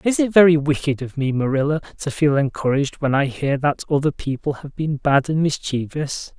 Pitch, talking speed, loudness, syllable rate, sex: 145 Hz, 195 wpm, -20 LUFS, 5.3 syllables/s, male